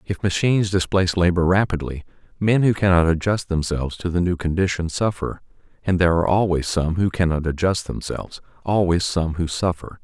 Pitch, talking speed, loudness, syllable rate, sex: 90 Hz, 165 wpm, -21 LUFS, 5.7 syllables/s, male